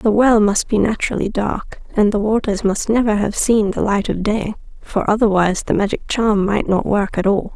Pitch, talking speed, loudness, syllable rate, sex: 210 Hz, 215 wpm, -17 LUFS, 5.1 syllables/s, female